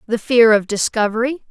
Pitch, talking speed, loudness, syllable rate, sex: 230 Hz, 160 wpm, -16 LUFS, 5.4 syllables/s, female